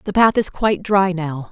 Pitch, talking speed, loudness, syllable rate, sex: 185 Hz, 235 wpm, -18 LUFS, 5.0 syllables/s, female